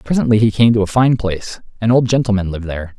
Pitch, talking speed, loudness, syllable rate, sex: 105 Hz, 240 wpm, -15 LUFS, 7.0 syllables/s, male